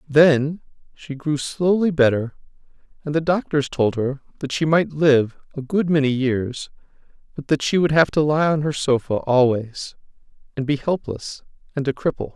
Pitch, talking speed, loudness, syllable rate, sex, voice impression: 145 Hz, 170 wpm, -20 LUFS, 4.6 syllables/s, male, masculine, adult-like, tensed, slightly powerful, bright, clear, fluent, cool, intellectual, calm, friendly, reassuring, wild, lively, kind